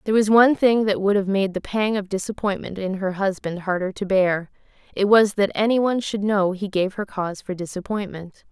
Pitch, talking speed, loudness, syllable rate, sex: 200 Hz, 220 wpm, -21 LUFS, 5.6 syllables/s, female